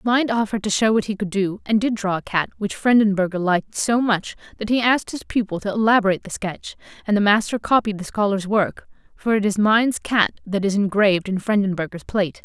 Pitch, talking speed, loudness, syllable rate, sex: 205 Hz, 215 wpm, -20 LUFS, 5.9 syllables/s, female